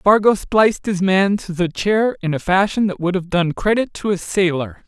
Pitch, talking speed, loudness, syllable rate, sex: 190 Hz, 220 wpm, -18 LUFS, 4.8 syllables/s, male